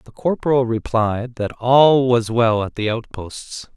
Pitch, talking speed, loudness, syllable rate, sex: 120 Hz, 160 wpm, -18 LUFS, 3.9 syllables/s, male